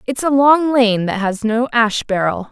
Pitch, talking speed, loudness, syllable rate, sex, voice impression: 235 Hz, 190 wpm, -15 LUFS, 4.3 syllables/s, female, very feminine, young, thin, very tensed, powerful, very bright, very hard, very clear, fluent, cute, slightly cool, intellectual, refreshing, very sincere, very calm, very friendly, very reassuring, very unique, elegant, slightly wild, slightly sweet, slightly lively, slightly strict, sharp, slightly modest, light